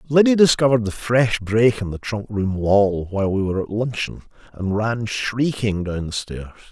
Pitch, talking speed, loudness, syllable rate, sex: 110 Hz, 190 wpm, -20 LUFS, 4.8 syllables/s, male